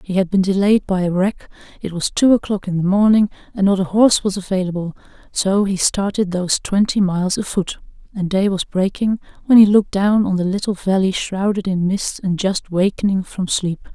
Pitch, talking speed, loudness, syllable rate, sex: 195 Hz, 200 wpm, -18 LUFS, 5.4 syllables/s, female